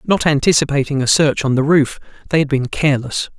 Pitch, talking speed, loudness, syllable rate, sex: 145 Hz, 195 wpm, -16 LUFS, 5.9 syllables/s, male